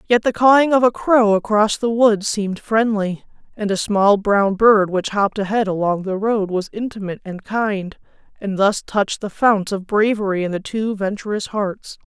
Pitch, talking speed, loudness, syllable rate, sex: 205 Hz, 190 wpm, -18 LUFS, 4.8 syllables/s, female